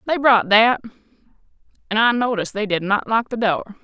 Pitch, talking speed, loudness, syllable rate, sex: 215 Hz, 190 wpm, -18 LUFS, 5.6 syllables/s, female